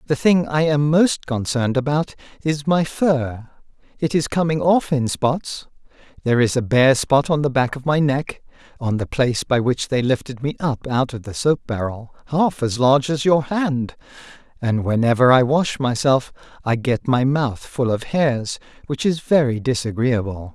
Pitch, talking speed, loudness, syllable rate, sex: 135 Hz, 185 wpm, -19 LUFS, 4.6 syllables/s, male